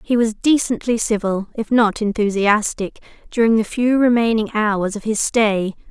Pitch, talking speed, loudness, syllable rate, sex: 220 Hz, 150 wpm, -18 LUFS, 4.6 syllables/s, female